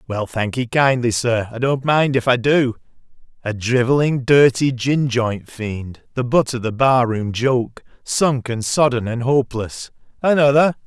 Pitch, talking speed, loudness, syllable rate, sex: 125 Hz, 155 wpm, -18 LUFS, 4.3 syllables/s, male